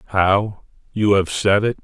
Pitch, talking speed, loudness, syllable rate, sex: 100 Hz, 165 wpm, -18 LUFS, 4.0 syllables/s, male